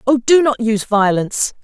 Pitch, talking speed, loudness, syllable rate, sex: 235 Hz, 185 wpm, -15 LUFS, 5.6 syllables/s, female